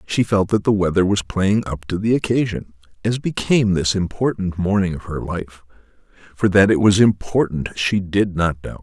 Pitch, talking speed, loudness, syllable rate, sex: 95 Hz, 190 wpm, -19 LUFS, 5.0 syllables/s, male